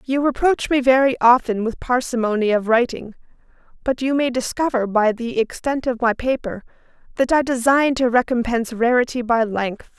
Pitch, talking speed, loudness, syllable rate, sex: 245 Hz, 160 wpm, -19 LUFS, 5.1 syllables/s, female